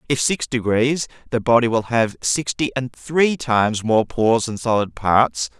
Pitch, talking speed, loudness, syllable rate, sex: 120 Hz, 170 wpm, -19 LUFS, 4.4 syllables/s, male